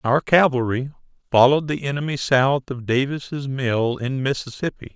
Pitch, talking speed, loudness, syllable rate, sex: 135 Hz, 135 wpm, -21 LUFS, 4.8 syllables/s, male